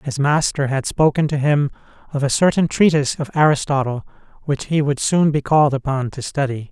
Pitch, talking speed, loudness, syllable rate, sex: 145 Hz, 190 wpm, -18 LUFS, 5.6 syllables/s, male